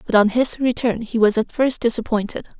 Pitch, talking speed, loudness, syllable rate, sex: 230 Hz, 210 wpm, -19 LUFS, 5.5 syllables/s, female